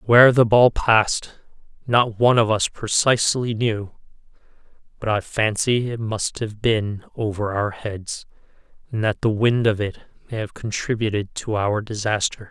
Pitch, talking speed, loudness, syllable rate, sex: 110 Hz, 155 wpm, -21 LUFS, 4.5 syllables/s, male